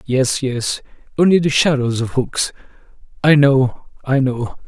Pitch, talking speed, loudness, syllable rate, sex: 135 Hz, 140 wpm, -17 LUFS, 4.0 syllables/s, male